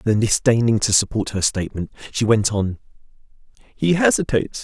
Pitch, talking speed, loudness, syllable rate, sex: 115 Hz, 140 wpm, -19 LUFS, 5.5 syllables/s, male